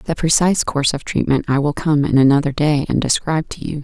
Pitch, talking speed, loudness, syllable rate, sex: 145 Hz, 235 wpm, -17 LUFS, 6.1 syllables/s, female